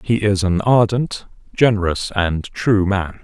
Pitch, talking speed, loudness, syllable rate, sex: 100 Hz, 150 wpm, -18 LUFS, 3.9 syllables/s, male